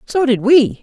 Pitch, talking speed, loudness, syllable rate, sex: 260 Hz, 220 wpm, -13 LUFS, 4.2 syllables/s, female